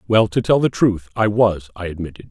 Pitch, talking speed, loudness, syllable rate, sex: 100 Hz, 235 wpm, -18 LUFS, 5.4 syllables/s, male